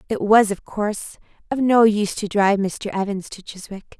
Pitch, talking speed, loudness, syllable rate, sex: 205 Hz, 195 wpm, -20 LUFS, 5.2 syllables/s, female